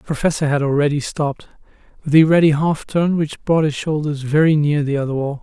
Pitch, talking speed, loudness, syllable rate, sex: 150 Hz, 210 wpm, -17 LUFS, 5.8 syllables/s, male